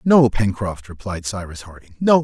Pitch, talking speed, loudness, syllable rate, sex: 110 Hz, 160 wpm, -21 LUFS, 4.7 syllables/s, male